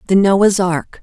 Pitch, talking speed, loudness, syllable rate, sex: 190 Hz, 175 wpm, -14 LUFS, 3.7 syllables/s, female